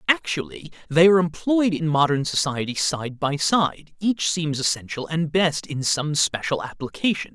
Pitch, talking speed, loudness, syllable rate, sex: 160 Hz, 155 wpm, -22 LUFS, 4.6 syllables/s, male